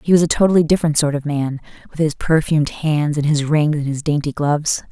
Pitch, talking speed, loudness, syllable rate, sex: 150 Hz, 230 wpm, -17 LUFS, 6.1 syllables/s, female